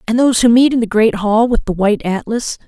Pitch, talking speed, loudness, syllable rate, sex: 225 Hz, 270 wpm, -14 LUFS, 6.1 syllables/s, male